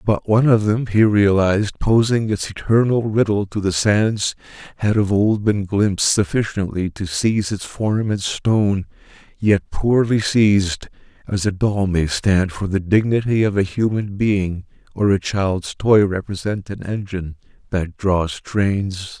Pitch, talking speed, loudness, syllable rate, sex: 100 Hz, 155 wpm, -19 LUFS, 4.3 syllables/s, male